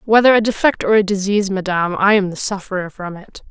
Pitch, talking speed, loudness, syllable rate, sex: 200 Hz, 225 wpm, -16 LUFS, 6.3 syllables/s, female